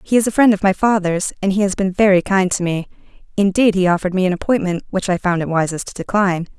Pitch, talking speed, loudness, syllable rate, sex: 190 Hz, 245 wpm, -17 LUFS, 6.6 syllables/s, female